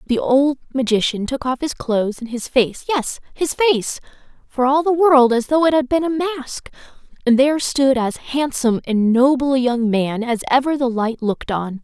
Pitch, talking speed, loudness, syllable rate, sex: 260 Hz, 195 wpm, -18 LUFS, 4.8 syllables/s, female